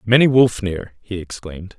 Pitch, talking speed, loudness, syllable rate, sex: 105 Hz, 170 wpm, -17 LUFS, 4.9 syllables/s, male